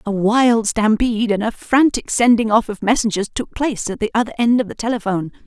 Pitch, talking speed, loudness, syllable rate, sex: 225 Hz, 210 wpm, -17 LUFS, 5.9 syllables/s, female